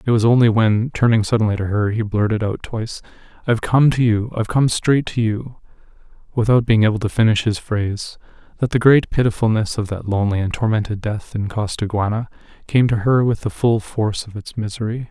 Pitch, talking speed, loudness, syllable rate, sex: 110 Hz, 195 wpm, -18 LUFS, 5.8 syllables/s, male